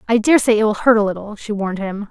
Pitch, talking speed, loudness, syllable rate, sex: 215 Hz, 285 wpm, -17 LUFS, 7.3 syllables/s, female